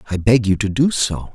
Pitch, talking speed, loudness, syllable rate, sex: 110 Hz, 265 wpm, -17 LUFS, 5.3 syllables/s, male